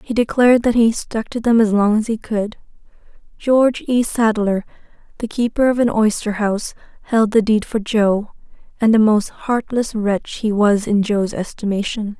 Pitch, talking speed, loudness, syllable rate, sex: 220 Hz, 175 wpm, -17 LUFS, 4.7 syllables/s, female